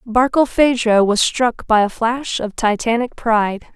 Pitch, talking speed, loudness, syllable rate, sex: 230 Hz, 145 wpm, -17 LUFS, 4.2 syllables/s, female